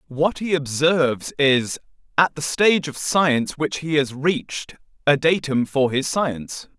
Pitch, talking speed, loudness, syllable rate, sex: 145 Hz, 160 wpm, -21 LUFS, 4.3 syllables/s, male